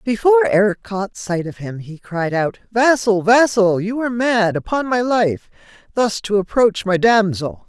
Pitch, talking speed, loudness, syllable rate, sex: 210 Hz, 170 wpm, -17 LUFS, 4.6 syllables/s, female